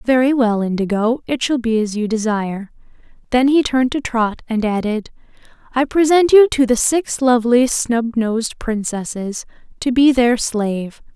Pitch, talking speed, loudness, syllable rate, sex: 240 Hz, 155 wpm, -17 LUFS, 4.8 syllables/s, female